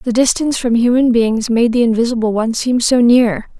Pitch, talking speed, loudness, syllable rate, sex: 235 Hz, 200 wpm, -14 LUFS, 5.5 syllables/s, female